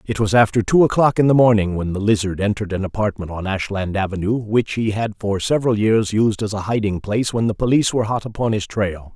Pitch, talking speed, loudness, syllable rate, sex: 105 Hz, 235 wpm, -19 LUFS, 6.1 syllables/s, male